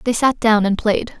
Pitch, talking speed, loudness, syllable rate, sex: 220 Hz, 250 wpm, -17 LUFS, 4.7 syllables/s, female